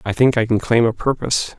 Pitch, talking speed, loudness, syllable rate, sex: 115 Hz, 265 wpm, -18 LUFS, 6.0 syllables/s, male